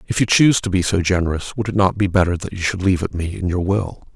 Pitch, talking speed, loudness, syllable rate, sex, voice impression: 95 Hz, 305 wpm, -18 LUFS, 6.6 syllables/s, male, masculine, adult-like, thick, slightly muffled, cool, slightly intellectual, slightly calm, slightly sweet